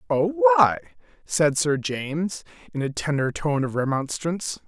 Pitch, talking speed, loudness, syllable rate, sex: 150 Hz, 140 wpm, -23 LUFS, 4.4 syllables/s, male